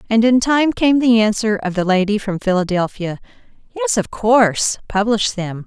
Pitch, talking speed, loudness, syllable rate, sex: 215 Hz, 160 wpm, -17 LUFS, 4.7 syllables/s, female